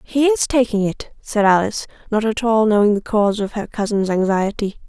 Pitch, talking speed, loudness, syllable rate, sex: 215 Hz, 195 wpm, -18 LUFS, 5.5 syllables/s, female